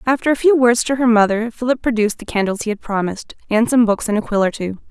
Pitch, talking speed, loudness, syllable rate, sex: 225 Hz, 270 wpm, -17 LUFS, 6.6 syllables/s, female